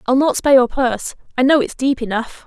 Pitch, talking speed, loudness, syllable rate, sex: 255 Hz, 220 wpm, -17 LUFS, 6.1 syllables/s, female